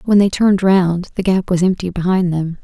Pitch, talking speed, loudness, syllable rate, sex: 185 Hz, 230 wpm, -15 LUFS, 5.4 syllables/s, female